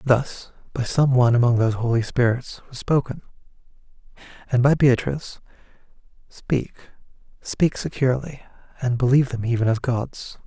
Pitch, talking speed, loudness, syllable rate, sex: 125 Hz, 125 wpm, -21 LUFS, 5.3 syllables/s, male